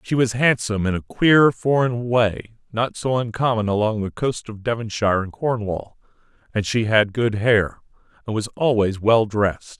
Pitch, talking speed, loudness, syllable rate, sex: 110 Hz, 170 wpm, -20 LUFS, 4.8 syllables/s, male